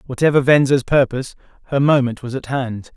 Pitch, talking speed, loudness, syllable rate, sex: 130 Hz, 160 wpm, -17 LUFS, 5.8 syllables/s, male